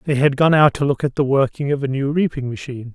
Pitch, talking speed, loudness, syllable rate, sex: 140 Hz, 285 wpm, -18 LUFS, 6.4 syllables/s, male